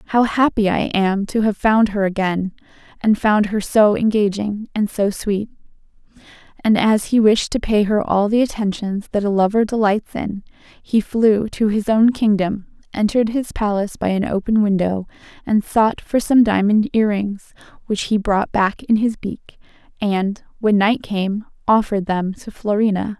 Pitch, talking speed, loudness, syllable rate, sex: 210 Hz, 175 wpm, -18 LUFS, 4.5 syllables/s, female